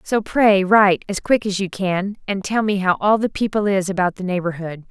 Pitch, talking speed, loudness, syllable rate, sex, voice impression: 195 Hz, 230 wpm, -19 LUFS, 5.2 syllables/s, female, feminine, adult-like, tensed, powerful, clear, slightly fluent, intellectual, elegant, lively, slightly strict, sharp